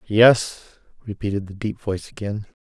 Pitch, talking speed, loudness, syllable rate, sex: 105 Hz, 135 wpm, -22 LUFS, 4.8 syllables/s, male